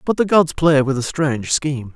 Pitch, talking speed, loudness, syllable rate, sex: 145 Hz, 245 wpm, -17 LUFS, 5.4 syllables/s, male